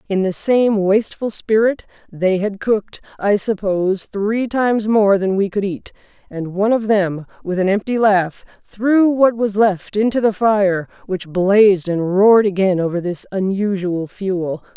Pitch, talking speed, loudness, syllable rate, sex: 200 Hz, 165 wpm, -17 LUFS, 4.3 syllables/s, female